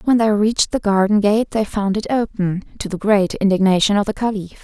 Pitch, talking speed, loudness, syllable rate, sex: 205 Hz, 220 wpm, -18 LUFS, 5.6 syllables/s, female